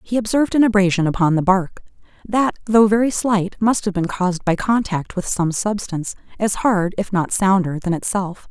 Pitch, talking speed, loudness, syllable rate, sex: 195 Hz, 190 wpm, -18 LUFS, 5.1 syllables/s, female